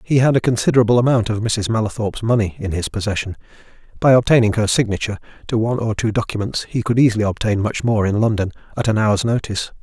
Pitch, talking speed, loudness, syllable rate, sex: 110 Hz, 200 wpm, -18 LUFS, 6.9 syllables/s, male